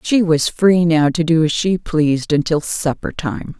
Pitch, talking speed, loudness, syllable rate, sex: 160 Hz, 200 wpm, -16 LUFS, 4.3 syllables/s, female